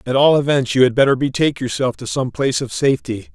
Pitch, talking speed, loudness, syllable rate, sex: 130 Hz, 235 wpm, -17 LUFS, 6.6 syllables/s, male